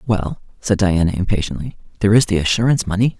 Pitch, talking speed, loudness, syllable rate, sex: 100 Hz, 170 wpm, -18 LUFS, 6.8 syllables/s, male